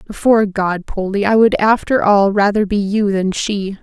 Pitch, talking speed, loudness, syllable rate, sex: 205 Hz, 190 wpm, -15 LUFS, 4.7 syllables/s, female